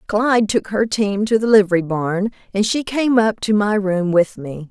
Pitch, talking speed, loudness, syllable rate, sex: 205 Hz, 215 wpm, -17 LUFS, 4.6 syllables/s, female